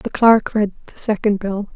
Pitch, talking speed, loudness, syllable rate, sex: 210 Hz, 205 wpm, -18 LUFS, 4.7 syllables/s, female